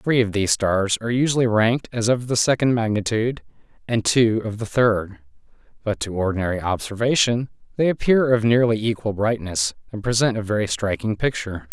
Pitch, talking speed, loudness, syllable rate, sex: 110 Hz, 170 wpm, -21 LUFS, 5.6 syllables/s, male